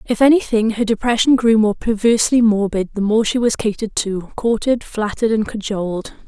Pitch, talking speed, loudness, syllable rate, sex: 220 Hz, 170 wpm, -17 LUFS, 5.5 syllables/s, female